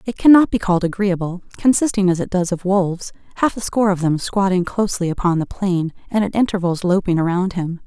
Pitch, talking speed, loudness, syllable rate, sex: 185 Hz, 190 wpm, -18 LUFS, 6.0 syllables/s, female